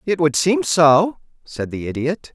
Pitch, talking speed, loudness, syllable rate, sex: 160 Hz, 180 wpm, -18 LUFS, 4.0 syllables/s, male